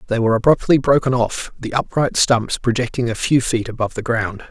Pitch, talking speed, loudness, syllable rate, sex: 120 Hz, 200 wpm, -18 LUFS, 5.7 syllables/s, male